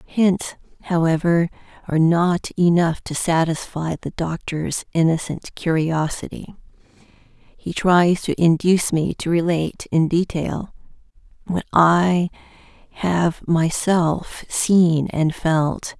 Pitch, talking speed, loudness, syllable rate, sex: 170 Hz, 100 wpm, -20 LUFS, 3.5 syllables/s, female